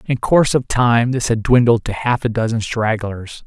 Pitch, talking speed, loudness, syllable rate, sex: 120 Hz, 210 wpm, -17 LUFS, 4.8 syllables/s, male